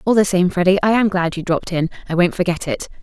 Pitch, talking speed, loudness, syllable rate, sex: 185 Hz, 275 wpm, -18 LUFS, 6.7 syllables/s, female